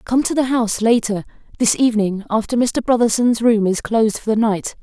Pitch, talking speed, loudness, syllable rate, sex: 225 Hz, 185 wpm, -17 LUFS, 5.6 syllables/s, female